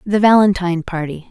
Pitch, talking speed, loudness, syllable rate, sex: 185 Hz, 140 wpm, -15 LUFS, 5.8 syllables/s, female